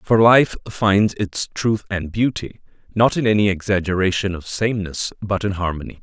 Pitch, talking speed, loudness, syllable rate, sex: 100 Hz, 160 wpm, -19 LUFS, 4.9 syllables/s, male